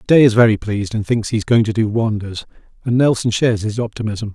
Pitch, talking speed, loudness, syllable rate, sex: 110 Hz, 220 wpm, -17 LUFS, 5.9 syllables/s, male